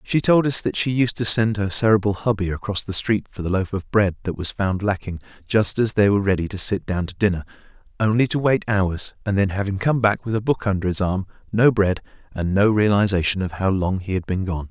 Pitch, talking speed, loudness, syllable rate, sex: 100 Hz, 245 wpm, -21 LUFS, 5.7 syllables/s, male